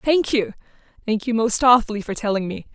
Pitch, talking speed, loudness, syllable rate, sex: 225 Hz, 175 wpm, -20 LUFS, 5.7 syllables/s, female